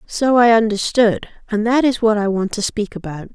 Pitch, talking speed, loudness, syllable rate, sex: 215 Hz, 215 wpm, -16 LUFS, 5.0 syllables/s, female